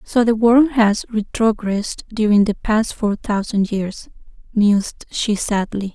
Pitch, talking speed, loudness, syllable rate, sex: 215 Hz, 140 wpm, -18 LUFS, 4.1 syllables/s, female